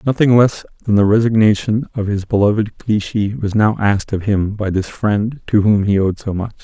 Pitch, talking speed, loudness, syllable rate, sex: 105 Hz, 210 wpm, -16 LUFS, 5.1 syllables/s, male